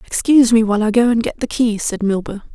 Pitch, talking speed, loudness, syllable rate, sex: 225 Hz, 260 wpm, -16 LUFS, 6.5 syllables/s, female